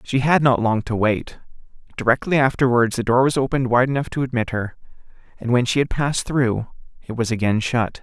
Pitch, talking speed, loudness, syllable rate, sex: 125 Hz, 200 wpm, -20 LUFS, 5.8 syllables/s, male